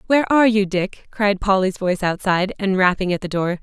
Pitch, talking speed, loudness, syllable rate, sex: 195 Hz, 215 wpm, -19 LUFS, 6.0 syllables/s, female